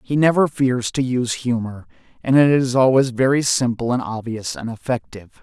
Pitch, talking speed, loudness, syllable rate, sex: 125 Hz, 175 wpm, -19 LUFS, 5.2 syllables/s, male